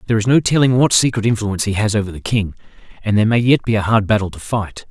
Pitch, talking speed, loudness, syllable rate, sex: 110 Hz, 270 wpm, -16 LUFS, 7.2 syllables/s, male